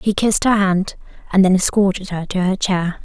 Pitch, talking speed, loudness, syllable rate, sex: 190 Hz, 215 wpm, -17 LUFS, 5.3 syllables/s, female